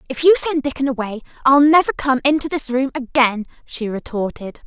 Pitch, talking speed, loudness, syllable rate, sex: 265 Hz, 180 wpm, -17 LUFS, 5.5 syllables/s, female